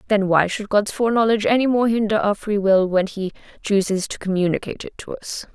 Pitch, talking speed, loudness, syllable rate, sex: 205 Hz, 205 wpm, -20 LUFS, 6.0 syllables/s, female